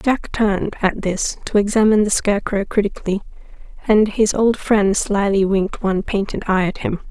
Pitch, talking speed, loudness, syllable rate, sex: 205 Hz, 170 wpm, -18 LUFS, 5.4 syllables/s, female